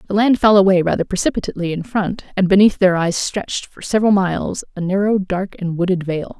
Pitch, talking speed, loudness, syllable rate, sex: 190 Hz, 205 wpm, -17 LUFS, 6.0 syllables/s, female